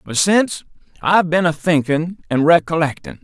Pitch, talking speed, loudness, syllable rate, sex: 165 Hz, 150 wpm, -17 LUFS, 5.1 syllables/s, male